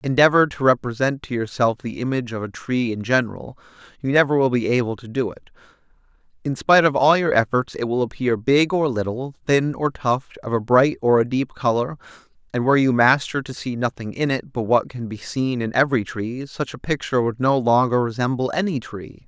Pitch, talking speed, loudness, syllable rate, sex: 125 Hz, 210 wpm, -21 LUFS, 5.6 syllables/s, male